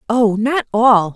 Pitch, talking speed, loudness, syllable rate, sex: 230 Hz, 155 wpm, -15 LUFS, 3.4 syllables/s, female